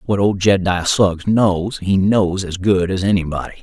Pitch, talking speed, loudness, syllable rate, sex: 95 Hz, 180 wpm, -17 LUFS, 4.3 syllables/s, male